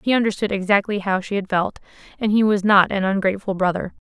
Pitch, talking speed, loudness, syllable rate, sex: 200 Hz, 205 wpm, -20 LUFS, 6.3 syllables/s, female